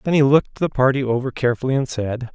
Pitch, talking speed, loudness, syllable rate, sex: 130 Hz, 230 wpm, -19 LUFS, 6.8 syllables/s, male